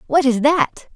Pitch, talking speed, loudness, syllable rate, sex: 270 Hz, 190 wpm, -17 LUFS, 4.1 syllables/s, female